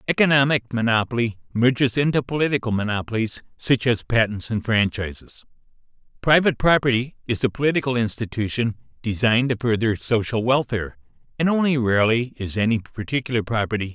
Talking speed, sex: 135 wpm, male